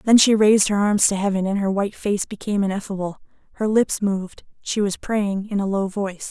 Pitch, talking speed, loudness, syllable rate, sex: 200 Hz, 220 wpm, -21 LUFS, 5.9 syllables/s, female